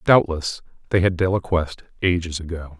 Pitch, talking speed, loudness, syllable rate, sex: 85 Hz, 130 wpm, -22 LUFS, 5.4 syllables/s, male